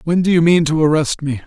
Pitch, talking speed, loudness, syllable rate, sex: 160 Hz, 285 wpm, -15 LUFS, 6.0 syllables/s, male